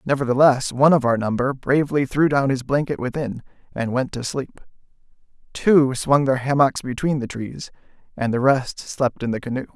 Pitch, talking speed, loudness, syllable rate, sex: 130 Hz, 180 wpm, -20 LUFS, 5.1 syllables/s, male